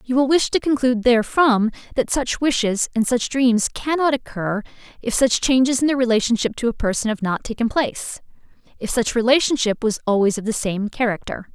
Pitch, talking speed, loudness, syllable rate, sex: 240 Hz, 185 wpm, -20 LUFS, 5.6 syllables/s, female